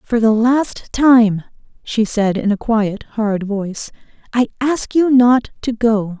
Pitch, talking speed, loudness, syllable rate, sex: 225 Hz, 165 wpm, -16 LUFS, 3.7 syllables/s, female